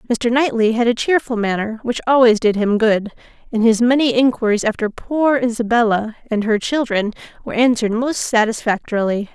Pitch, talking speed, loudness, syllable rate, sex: 230 Hz, 160 wpm, -17 LUFS, 5.5 syllables/s, female